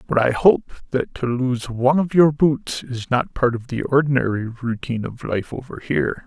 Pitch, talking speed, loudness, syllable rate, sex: 130 Hz, 200 wpm, -20 LUFS, 4.9 syllables/s, male